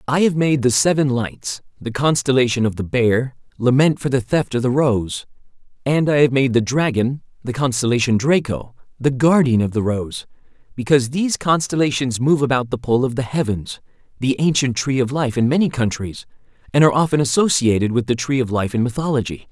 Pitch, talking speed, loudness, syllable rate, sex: 130 Hz, 190 wpm, -18 LUFS, 5.5 syllables/s, male